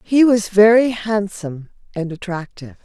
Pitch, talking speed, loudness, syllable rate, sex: 200 Hz, 125 wpm, -16 LUFS, 4.9 syllables/s, female